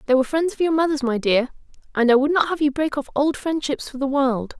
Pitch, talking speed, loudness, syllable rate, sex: 285 Hz, 275 wpm, -21 LUFS, 6.1 syllables/s, female